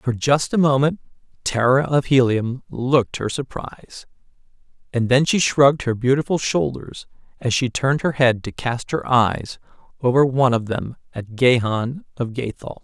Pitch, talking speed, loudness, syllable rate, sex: 130 Hz, 160 wpm, -20 LUFS, 4.7 syllables/s, male